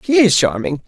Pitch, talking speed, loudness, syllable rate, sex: 180 Hz, 205 wpm, -15 LUFS, 5.5 syllables/s, male